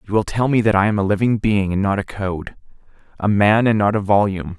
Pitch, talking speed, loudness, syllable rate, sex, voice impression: 100 Hz, 250 wpm, -18 LUFS, 6.0 syllables/s, male, masculine, adult-like, tensed, powerful, bright, clear, fluent, intellectual, sincere, slightly friendly, reassuring, wild, lively, slightly strict